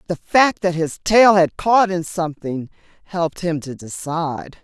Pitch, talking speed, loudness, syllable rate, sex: 170 Hz, 170 wpm, -18 LUFS, 4.5 syllables/s, female